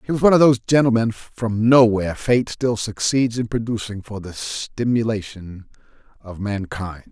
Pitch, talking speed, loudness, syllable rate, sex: 110 Hz, 150 wpm, -19 LUFS, 5.0 syllables/s, male